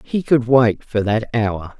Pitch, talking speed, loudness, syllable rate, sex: 115 Hz, 200 wpm, -18 LUFS, 3.6 syllables/s, female